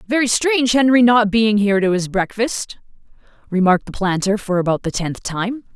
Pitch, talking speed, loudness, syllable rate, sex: 210 Hz, 175 wpm, -17 LUFS, 5.4 syllables/s, female